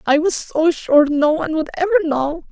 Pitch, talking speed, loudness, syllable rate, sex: 315 Hz, 215 wpm, -17 LUFS, 5.2 syllables/s, female